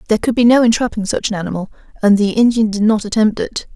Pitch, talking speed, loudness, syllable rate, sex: 215 Hz, 240 wpm, -15 LUFS, 6.9 syllables/s, female